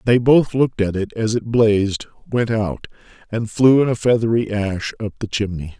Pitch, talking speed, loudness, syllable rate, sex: 110 Hz, 185 wpm, -18 LUFS, 4.8 syllables/s, male